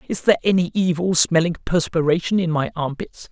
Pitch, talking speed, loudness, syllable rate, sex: 170 Hz, 165 wpm, -19 LUFS, 5.8 syllables/s, male